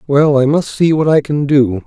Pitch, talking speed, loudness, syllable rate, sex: 145 Hz, 255 wpm, -13 LUFS, 4.7 syllables/s, male